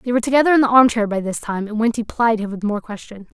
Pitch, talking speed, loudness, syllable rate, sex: 225 Hz, 285 wpm, -18 LUFS, 6.9 syllables/s, female